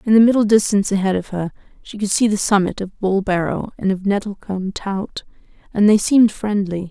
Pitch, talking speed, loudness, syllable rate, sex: 200 Hz, 190 wpm, -18 LUFS, 5.7 syllables/s, female